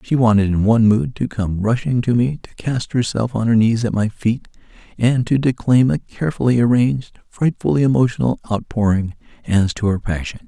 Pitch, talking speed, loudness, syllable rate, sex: 115 Hz, 185 wpm, -18 LUFS, 5.3 syllables/s, male